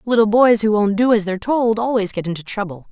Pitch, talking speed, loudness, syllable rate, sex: 215 Hz, 245 wpm, -17 LUFS, 6.2 syllables/s, female